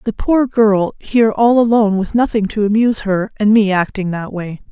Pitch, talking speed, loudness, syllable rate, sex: 210 Hz, 205 wpm, -15 LUFS, 5.2 syllables/s, female